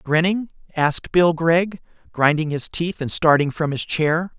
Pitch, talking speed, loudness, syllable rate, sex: 160 Hz, 165 wpm, -20 LUFS, 4.3 syllables/s, male